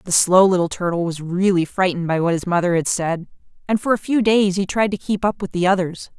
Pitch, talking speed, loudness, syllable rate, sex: 185 Hz, 250 wpm, -19 LUFS, 5.8 syllables/s, female